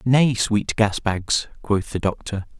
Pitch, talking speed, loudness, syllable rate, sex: 105 Hz, 160 wpm, -22 LUFS, 3.5 syllables/s, male